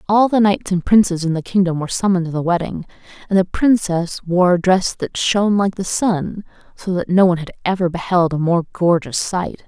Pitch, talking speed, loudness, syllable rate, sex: 180 Hz, 215 wpm, -17 LUFS, 5.5 syllables/s, female